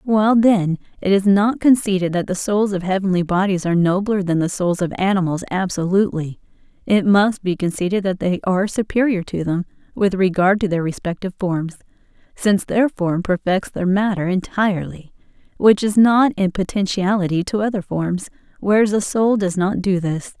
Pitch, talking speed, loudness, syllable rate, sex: 190 Hz, 170 wpm, -18 LUFS, 5.2 syllables/s, female